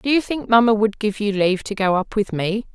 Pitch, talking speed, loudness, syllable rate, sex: 210 Hz, 285 wpm, -19 LUFS, 5.6 syllables/s, female